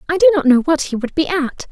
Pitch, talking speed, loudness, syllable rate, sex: 310 Hz, 315 wpm, -16 LUFS, 7.3 syllables/s, female